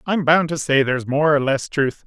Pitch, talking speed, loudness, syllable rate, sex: 145 Hz, 260 wpm, -18 LUFS, 5.2 syllables/s, male